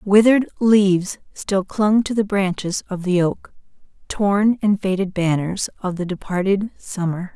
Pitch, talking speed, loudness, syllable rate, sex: 195 Hz, 145 wpm, -19 LUFS, 4.3 syllables/s, female